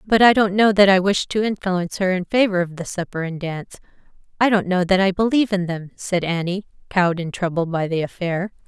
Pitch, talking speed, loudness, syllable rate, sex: 185 Hz, 230 wpm, -20 LUFS, 5.8 syllables/s, female